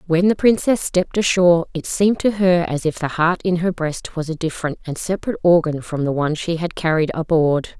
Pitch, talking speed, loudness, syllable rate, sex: 170 Hz, 225 wpm, -19 LUFS, 5.8 syllables/s, female